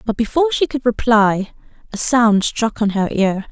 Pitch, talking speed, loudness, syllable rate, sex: 225 Hz, 190 wpm, -16 LUFS, 4.7 syllables/s, female